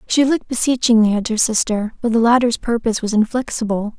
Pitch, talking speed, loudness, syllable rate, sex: 230 Hz, 180 wpm, -17 LUFS, 6.1 syllables/s, female